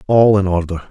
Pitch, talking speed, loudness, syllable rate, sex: 95 Hz, 200 wpm, -14 LUFS, 5.7 syllables/s, male